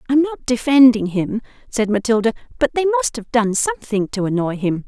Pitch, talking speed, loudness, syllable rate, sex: 240 Hz, 185 wpm, -18 LUFS, 5.6 syllables/s, female